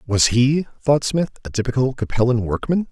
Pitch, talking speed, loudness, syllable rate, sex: 125 Hz, 165 wpm, -19 LUFS, 5.0 syllables/s, male